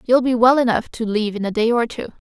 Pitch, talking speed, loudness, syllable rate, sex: 230 Hz, 290 wpm, -18 LUFS, 6.7 syllables/s, female